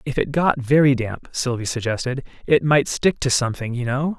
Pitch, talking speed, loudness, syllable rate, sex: 130 Hz, 200 wpm, -20 LUFS, 5.2 syllables/s, male